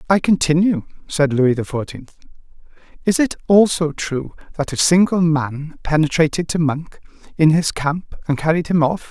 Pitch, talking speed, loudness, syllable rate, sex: 160 Hz, 160 wpm, -18 LUFS, 4.7 syllables/s, male